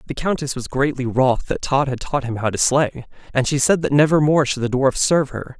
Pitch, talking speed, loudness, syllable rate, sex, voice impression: 135 Hz, 255 wpm, -19 LUFS, 5.5 syllables/s, male, masculine, adult-like, slightly relaxed, powerful, soft, slightly muffled, slightly raspy, cool, intellectual, sincere, friendly, wild, lively